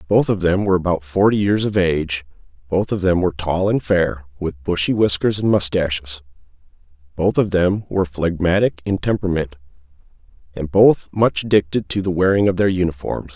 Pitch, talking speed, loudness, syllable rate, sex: 90 Hz, 170 wpm, -18 LUFS, 5.5 syllables/s, male